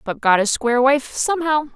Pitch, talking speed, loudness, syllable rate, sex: 265 Hz, 170 wpm, -18 LUFS, 5.7 syllables/s, female